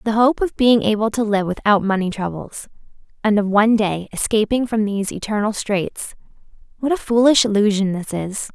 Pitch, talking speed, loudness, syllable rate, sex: 215 Hz, 170 wpm, -18 LUFS, 5.3 syllables/s, female